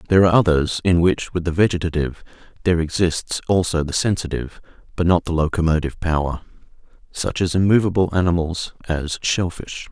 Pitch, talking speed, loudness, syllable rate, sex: 85 Hz, 145 wpm, -20 LUFS, 6.0 syllables/s, male